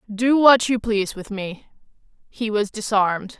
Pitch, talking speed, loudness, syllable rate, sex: 220 Hz, 160 wpm, -20 LUFS, 4.6 syllables/s, female